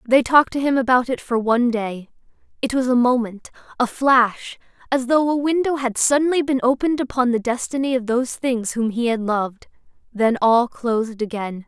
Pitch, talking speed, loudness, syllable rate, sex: 245 Hz, 190 wpm, -19 LUFS, 5.4 syllables/s, female